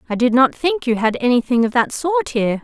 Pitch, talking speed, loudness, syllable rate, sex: 240 Hz, 275 wpm, -17 LUFS, 5.8 syllables/s, female